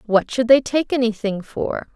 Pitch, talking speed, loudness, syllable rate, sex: 235 Hz, 185 wpm, -19 LUFS, 4.5 syllables/s, female